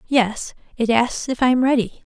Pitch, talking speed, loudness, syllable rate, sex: 240 Hz, 200 wpm, -19 LUFS, 4.7 syllables/s, female